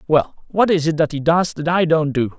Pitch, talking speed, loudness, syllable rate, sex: 155 Hz, 275 wpm, -18 LUFS, 5.2 syllables/s, male